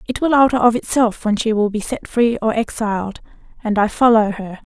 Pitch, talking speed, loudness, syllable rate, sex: 225 Hz, 215 wpm, -17 LUFS, 5.5 syllables/s, female